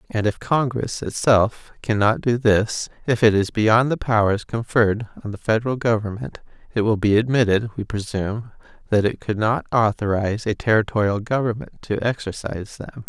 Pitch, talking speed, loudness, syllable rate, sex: 110 Hz, 155 wpm, -21 LUFS, 5.1 syllables/s, male